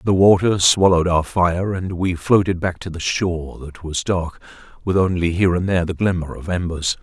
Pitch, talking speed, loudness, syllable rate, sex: 90 Hz, 205 wpm, -19 LUFS, 5.3 syllables/s, male